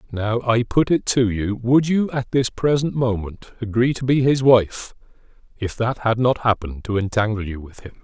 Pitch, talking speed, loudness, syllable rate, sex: 115 Hz, 200 wpm, -20 LUFS, 4.9 syllables/s, male